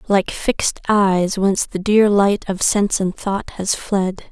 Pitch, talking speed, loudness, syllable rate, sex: 195 Hz, 180 wpm, -18 LUFS, 4.0 syllables/s, female